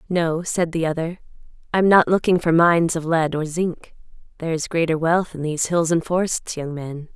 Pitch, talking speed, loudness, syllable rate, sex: 165 Hz, 210 wpm, -20 LUFS, 5.3 syllables/s, female